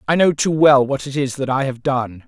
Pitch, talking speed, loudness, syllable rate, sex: 135 Hz, 290 wpm, -17 LUFS, 5.2 syllables/s, male